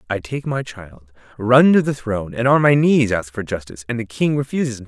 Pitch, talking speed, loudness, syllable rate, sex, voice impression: 120 Hz, 245 wpm, -18 LUFS, 5.6 syllables/s, male, masculine, adult-like, clear, fluent, cool, intellectual, sincere, calm, slightly friendly, wild, kind